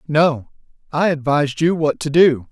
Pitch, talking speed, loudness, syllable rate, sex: 150 Hz, 165 wpm, -17 LUFS, 4.6 syllables/s, male